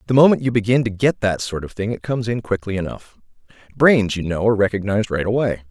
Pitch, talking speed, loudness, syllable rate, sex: 110 Hz, 230 wpm, -19 LUFS, 6.5 syllables/s, male